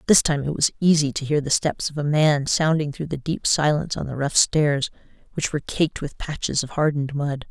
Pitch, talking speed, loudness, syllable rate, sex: 150 Hz, 230 wpm, -22 LUFS, 5.6 syllables/s, female